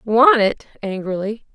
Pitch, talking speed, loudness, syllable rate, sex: 225 Hz, 115 wpm, -18 LUFS, 4.1 syllables/s, female